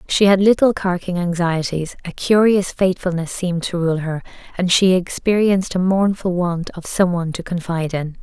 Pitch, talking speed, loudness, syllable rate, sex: 180 Hz, 175 wpm, -18 LUFS, 5.3 syllables/s, female